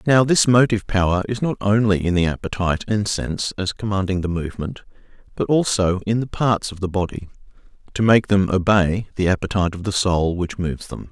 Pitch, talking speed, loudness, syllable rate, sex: 100 Hz, 195 wpm, -20 LUFS, 5.8 syllables/s, male